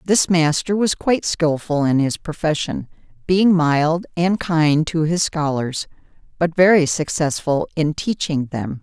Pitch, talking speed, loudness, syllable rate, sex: 160 Hz, 145 wpm, -19 LUFS, 4.1 syllables/s, female